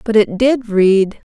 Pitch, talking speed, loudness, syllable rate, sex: 215 Hz, 180 wpm, -14 LUFS, 3.6 syllables/s, female